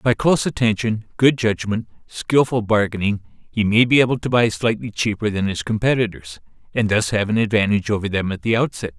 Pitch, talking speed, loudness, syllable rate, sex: 110 Hz, 185 wpm, -19 LUFS, 5.7 syllables/s, male